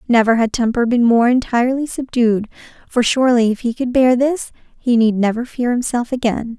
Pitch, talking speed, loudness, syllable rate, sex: 240 Hz, 180 wpm, -16 LUFS, 5.4 syllables/s, female